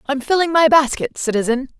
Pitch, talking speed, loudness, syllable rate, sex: 280 Hz, 170 wpm, -16 LUFS, 5.7 syllables/s, female